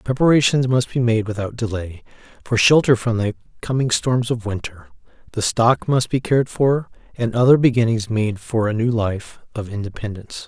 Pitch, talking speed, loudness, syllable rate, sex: 115 Hz, 170 wpm, -19 LUFS, 5.2 syllables/s, male